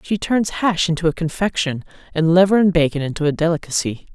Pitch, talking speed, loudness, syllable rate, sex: 170 Hz, 190 wpm, -18 LUFS, 5.9 syllables/s, female